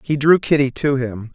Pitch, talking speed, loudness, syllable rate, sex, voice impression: 140 Hz, 225 wpm, -17 LUFS, 4.8 syllables/s, male, very masculine, very adult-like, middle-aged, thick, slightly tensed, slightly weak, slightly dark, slightly hard, slightly clear, slightly halting, slightly cool, slightly intellectual, sincere, calm, slightly mature, friendly, reassuring, slightly unique, slightly wild, slightly lively, kind, modest